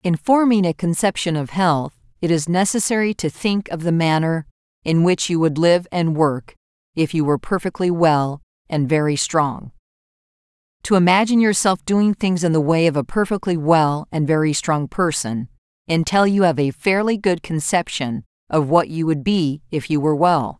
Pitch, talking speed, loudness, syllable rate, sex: 165 Hz, 180 wpm, -19 LUFS, 4.9 syllables/s, female